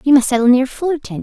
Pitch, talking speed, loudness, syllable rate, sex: 265 Hz, 245 wpm, -15 LUFS, 7.1 syllables/s, female